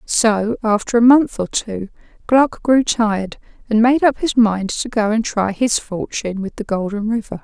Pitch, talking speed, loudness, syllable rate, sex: 220 Hz, 195 wpm, -17 LUFS, 4.6 syllables/s, female